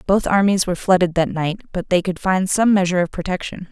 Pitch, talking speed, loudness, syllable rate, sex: 185 Hz, 225 wpm, -18 LUFS, 6.1 syllables/s, female